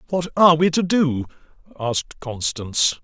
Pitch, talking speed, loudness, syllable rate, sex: 150 Hz, 140 wpm, -20 LUFS, 4.9 syllables/s, male